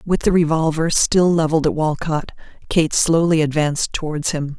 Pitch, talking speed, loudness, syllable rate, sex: 160 Hz, 155 wpm, -18 LUFS, 5.1 syllables/s, female